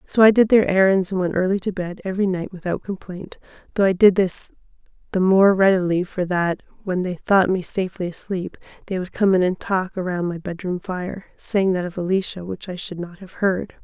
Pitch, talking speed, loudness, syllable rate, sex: 185 Hz, 210 wpm, -21 LUFS, 5.3 syllables/s, female